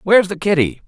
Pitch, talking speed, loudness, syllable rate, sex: 180 Hz, 205 wpm, -16 LUFS, 6.8 syllables/s, male